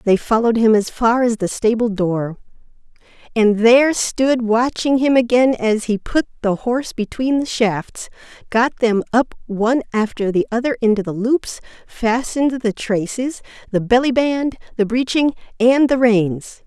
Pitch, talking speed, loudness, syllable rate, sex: 235 Hz, 160 wpm, -17 LUFS, 4.5 syllables/s, female